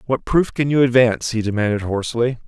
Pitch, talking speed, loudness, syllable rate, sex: 120 Hz, 195 wpm, -18 LUFS, 6.1 syllables/s, male